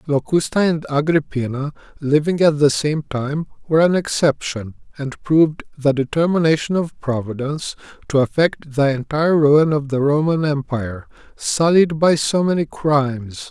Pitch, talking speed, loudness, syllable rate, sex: 150 Hz, 140 wpm, -18 LUFS, 4.8 syllables/s, male